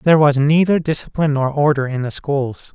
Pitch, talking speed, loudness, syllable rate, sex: 145 Hz, 195 wpm, -17 LUFS, 5.7 syllables/s, male